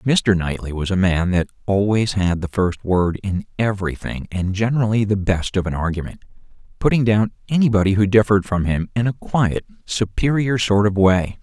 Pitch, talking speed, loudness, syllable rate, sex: 100 Hz, 175 wpm, -19 LUFS, 5.2 syllables/s, male